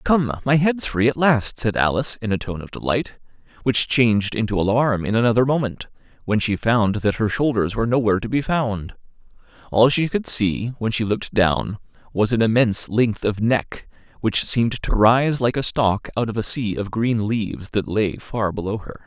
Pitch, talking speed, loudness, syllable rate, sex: 115 Hz, 200 wpm, -20 LUFS, 5.0 syllables/s, male